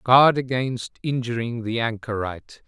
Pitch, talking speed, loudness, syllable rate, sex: 120 Hz, 110 wpm, -23 LUFS, 4.5 syllables/s, male